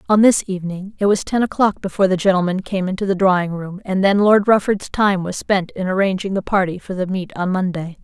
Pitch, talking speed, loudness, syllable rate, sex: 190 Hz, 230 wpm, -18 LUFS, 5.9 syllables/s, female